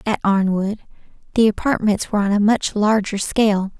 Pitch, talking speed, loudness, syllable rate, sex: 210 Hz, 160 wpm, -18 LUFS, 5.3 syllables/s, female